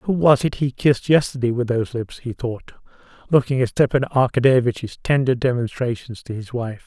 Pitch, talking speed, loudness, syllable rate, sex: 125 Hz, 175 wpm, -20 LUFS, 5.4 syllables/s, male